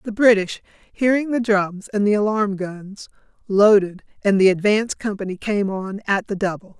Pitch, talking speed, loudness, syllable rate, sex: 205 Hz, 170 wpm, -19 LUFS, 4.8 syllables/s, female